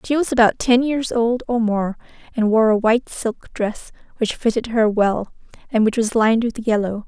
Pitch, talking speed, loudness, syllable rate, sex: 230 Hz, 205 wpm, -19 LUFS, 4.9 syllables/s, female